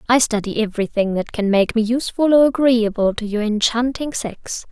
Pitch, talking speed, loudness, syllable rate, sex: 230 Hz, 180 wpm, -18 LUFS, 5.3 syllables/s, female